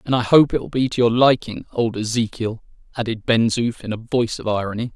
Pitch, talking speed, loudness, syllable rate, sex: 115 Hz, 230 wpm, -20 LUFS, 5.8 syllables/s, male